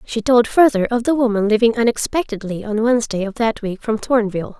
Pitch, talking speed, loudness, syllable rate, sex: 225 Hz, 195 wpm, -17 LUFS, 5.8 syllables/s, female